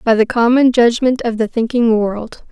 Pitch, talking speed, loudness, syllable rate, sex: 235 Hz, 190 wpm, -14 LUFS, 4.7 syllables/s, female